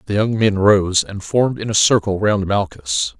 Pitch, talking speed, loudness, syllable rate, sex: 100 Hz, 205 wpm, -17 LUFS, 4.6 syllables/s, male